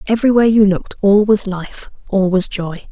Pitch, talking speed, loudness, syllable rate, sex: 200 Hz, 185 wpm, -14 LUFS, 5.5 syllables/s, female